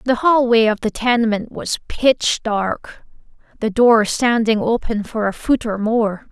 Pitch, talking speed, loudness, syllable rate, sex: 225 Hz, 160 wpm, -17 LUFS, 4.0 syllables/s, female